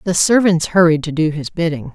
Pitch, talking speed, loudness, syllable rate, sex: 165 Hz, 215 wpm, -15 LUFS, 5.5 syllables/s, female